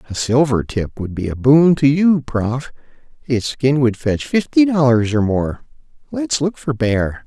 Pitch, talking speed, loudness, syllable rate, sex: 130 Hz, 175 wpm, -17 LUFS, 4.1 syllables/s, male